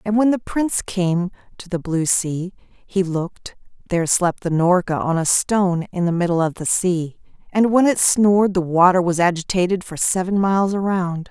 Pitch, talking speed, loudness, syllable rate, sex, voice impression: 185 Hz, 185 wpm, -19 LUFS, 4.9 syllables/s, female, very feminine, very adult-like, slightly clear, intellectual